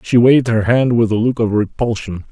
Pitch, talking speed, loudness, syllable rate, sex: 115 Hz, 235 wpm, -15 LUFS, 5.5 syllables/s, male